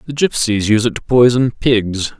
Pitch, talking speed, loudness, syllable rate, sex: 115 Hz, 190 wpm, -14 LUFS, 5.2 syllables/s, male